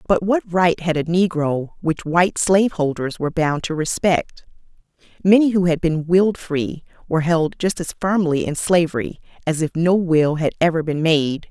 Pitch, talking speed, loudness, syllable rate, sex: 165 Hz, 185 wpm, -19 LUFS, 4.9 syllables/s, female